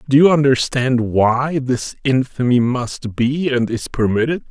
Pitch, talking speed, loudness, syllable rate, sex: 130 Hz, 145 wpm, -17 LUFS, 4.1 syllables/s, male